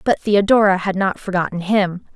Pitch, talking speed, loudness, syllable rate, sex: 195 Hz, 165 wpm, -17 LUFS, 5.1 syllables/s, female